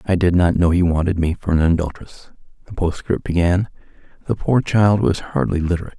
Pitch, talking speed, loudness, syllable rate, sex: 90 Hz, 190 wpm, -18 LUFS, 5.9 syllables/s, male